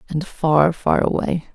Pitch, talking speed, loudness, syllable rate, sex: 160 Hz, 155 wpm, -19 LUFS, 3.9 syllables/s, female